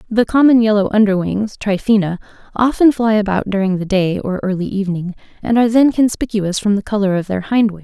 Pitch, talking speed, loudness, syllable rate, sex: 205 Hz, 200 wpm, -15 LUFS, 5.9 syllables/s, female